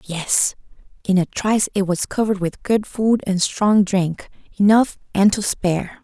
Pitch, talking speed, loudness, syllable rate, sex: 200 Hz, 170 wpm, -19 LUFS, 4.4 syllables/s, female